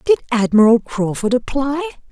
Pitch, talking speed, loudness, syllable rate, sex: 250 Hz, 115 wpm, -16 LUFS, 4.7 syllables/s, female